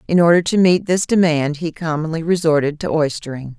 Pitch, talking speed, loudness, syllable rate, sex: 160 Hz, 185 wpm, -17 LUFS, 5.5 syllables/s, female